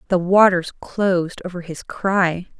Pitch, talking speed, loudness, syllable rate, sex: 180 Hz, 140 wpm, -18 LUFS, 4.2 syllables/s, female